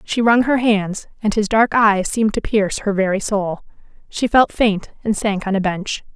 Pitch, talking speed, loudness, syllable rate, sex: 210 Hz, 215 wpm, -18 LUFS, 4.7 syllables/s, female